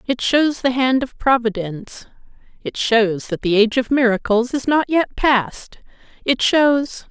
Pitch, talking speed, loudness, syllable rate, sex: 245 Hz, 160 wpm, -18 LUFS, 4.3 syllables/s, female